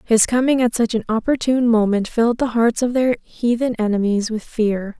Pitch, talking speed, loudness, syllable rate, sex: 230 Hz, 190 wpm, -18 LUFS, 5.2 syllables/s, female